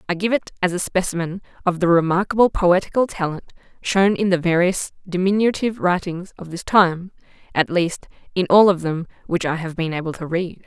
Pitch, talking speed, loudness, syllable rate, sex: 180 Hz, 185 wpm, -20 LUFS, 5.5 syllables/s, female